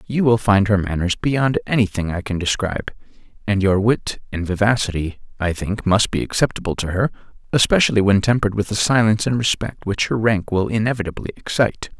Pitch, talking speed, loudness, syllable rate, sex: 105 Hz, 180 wpm, -19 LUFS, 5.9 syllables/s, male